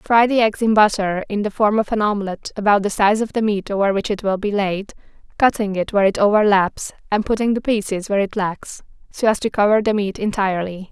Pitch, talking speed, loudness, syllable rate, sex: 205 Hz, 230 wpm, -18 LUFS, 5.9 syllables/s, female